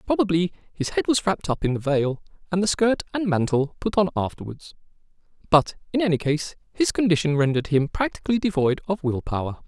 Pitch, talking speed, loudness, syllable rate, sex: 165 Hz, 185 wpm, -23 LUFS, 6.0 syllables/s, male